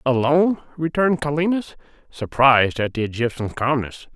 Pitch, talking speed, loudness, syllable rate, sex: 140 Hz, 115 wpm, -20 LUFS, 5.4 syllables/s, male